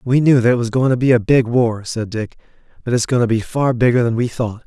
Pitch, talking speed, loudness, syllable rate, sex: 120 Hz, 295 wpm, -16 LUFS, 5.9 syllables/s, male